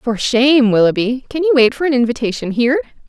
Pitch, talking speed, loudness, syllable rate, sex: 250 Hz, 195 wpm, -14 LUFS, 6.2 syllables/s, female